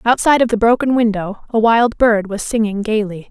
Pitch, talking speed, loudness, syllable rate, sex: 220 Hz, 200 wpm, -15 LUFS, 5.4 syllables/s, female